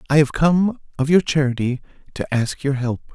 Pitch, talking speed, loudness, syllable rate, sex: 145 Hz, 190 wpm, -20 LUFS, 4.9 syllables/s, male